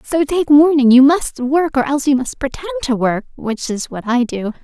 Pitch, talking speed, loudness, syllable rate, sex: 275 Hz, 235 wpm, -15 LUFS, 5.0 syllables/s, female